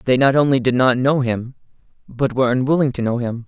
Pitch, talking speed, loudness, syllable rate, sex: 130 Hz, 225 wpm, -18 LUFS, 6.1 syllables/s, male